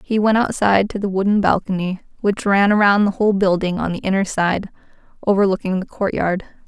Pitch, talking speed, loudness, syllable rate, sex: 195 Hz, 180 wpm, -18 LUFS, 5.7 syllables/s, female